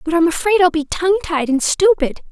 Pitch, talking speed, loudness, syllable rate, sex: 340 Hz, 235 wpm, -16 LUFS, 5.9 syllables/s, female